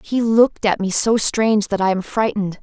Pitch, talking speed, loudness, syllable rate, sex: 210 Hz, 230 wpm, -17 LUFS, 5.5 syllables/s, female